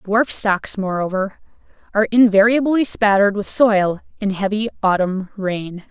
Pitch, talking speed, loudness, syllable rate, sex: 205 Hz, 120 wpm, -18 LUFS, 4.5 syllables/s, female